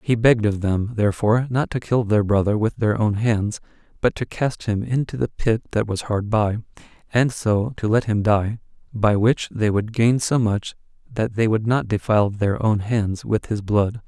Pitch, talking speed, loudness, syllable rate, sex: 110 Hz, 210 wpm, -21 LUFS, 4.7 syllables/s, male